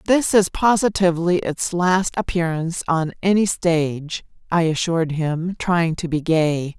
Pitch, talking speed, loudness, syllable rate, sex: 170 Hz, 140 wpm, -20 LUFS, 4.3 syllables/s, female